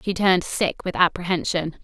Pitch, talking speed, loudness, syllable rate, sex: 180 Hz, 165 wpm, -22 LUFS, 5.7 syllables/s, female